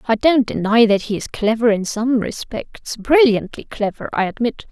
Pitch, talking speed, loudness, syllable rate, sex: 230 Hz, 165 wpm, -18 LUFS, 4.7 syllables/s, female